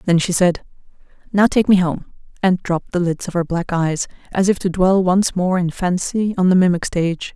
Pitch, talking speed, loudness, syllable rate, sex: 180 Hz, 220 wpm, -18 LUFS, 5.2 syllables/s, female